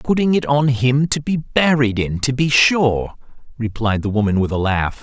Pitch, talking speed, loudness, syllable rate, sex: 125 Hz, 205 wpm, -17 LUFS, 4.6 syllables/s, male